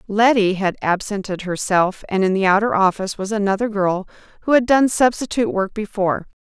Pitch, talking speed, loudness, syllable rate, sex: 205 Hz, 170 wpm, -19 LUFS, 5.7 syllables/s, female